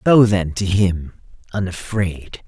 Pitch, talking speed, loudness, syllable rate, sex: 95 Hz, 95 wpm, -19 LUFS, 3.6 syllables/s, male